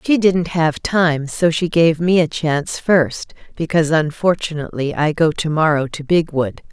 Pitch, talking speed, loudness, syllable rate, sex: 160 Hz, 170 wpm, -17 LUFS, 4.6 syllables/s, female